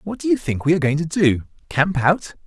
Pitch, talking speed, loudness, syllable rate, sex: 160 Hz, 245 wpm, -20 LUFS, 6.0 syllables/s, male